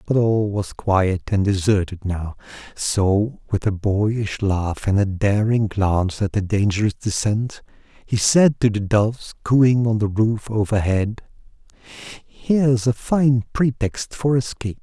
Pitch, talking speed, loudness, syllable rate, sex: 105 Hz, 145 wpm, -20 LUFS, 3.9 syllables/s, male